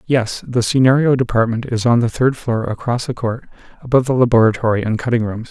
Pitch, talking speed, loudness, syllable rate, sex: 120 Hz, 195 wpm, -16 LUFS, 6.0 syllables/s, male